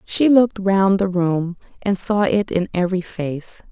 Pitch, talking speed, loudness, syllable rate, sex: 190 Hz, 180 wpm, -19 LUFS, 4.3 syllables/s, female